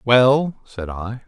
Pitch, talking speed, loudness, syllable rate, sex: 120 Hz, 140 wpm, -19 LUFS, 2.9 syllables/s, male